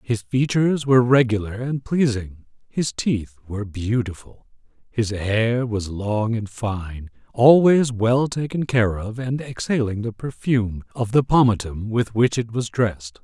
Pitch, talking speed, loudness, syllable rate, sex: 115 Hz, 150 wpm, -21 LUFS, 4.2 syllables/s, male